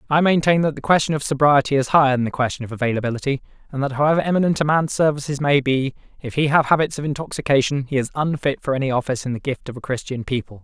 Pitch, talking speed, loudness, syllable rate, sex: 140 Hz, 235 wpm, -20 LUFS, 7.2 syllables/s, male